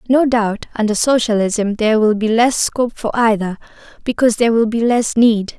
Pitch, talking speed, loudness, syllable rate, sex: 225 Hz, 185 wpm, -15 LUFS, 5.4 syllables/s, female